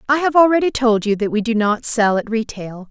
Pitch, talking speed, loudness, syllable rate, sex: 230 Hz, 250 wpm, -17 LUFS, 5.5 syllables/s, female